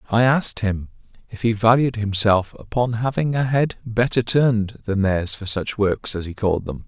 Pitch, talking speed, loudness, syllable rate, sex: 110 Hz, 190 wpm, -21 LUFS, 4.9 syllables/s, male